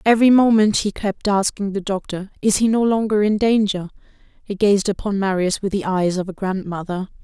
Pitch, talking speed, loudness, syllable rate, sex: 200 Hz, 190 wpm, -19 LUFS, 5.3 syllables/s, female